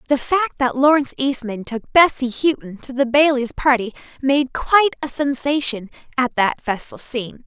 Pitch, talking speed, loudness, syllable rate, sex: 265 Hz, 160 wpm, -19 LUFS, 4.8 syllables/s, female